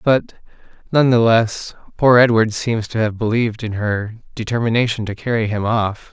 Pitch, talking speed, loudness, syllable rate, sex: 115 Hz, 165 wpm, -17 LUFS, 5.1 syllables/s, male